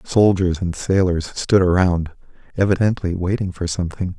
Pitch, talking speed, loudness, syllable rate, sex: 90 Hz, 130 wpm, -19 LUFS, 4.9 syllables/s, male